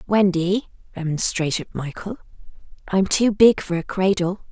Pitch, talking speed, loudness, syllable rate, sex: 190 Hz, 120 wpm, -20 LUFS, 4.5 syllables/s, female